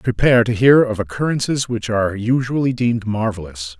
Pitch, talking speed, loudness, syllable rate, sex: 115 Hz, 160 wpm, -17 LUFS, 5.6 syllables/s, male